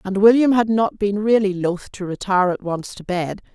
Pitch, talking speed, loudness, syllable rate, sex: 200 Hz, 220 wpm, -19 LUFS, 5.1 syllables/s, female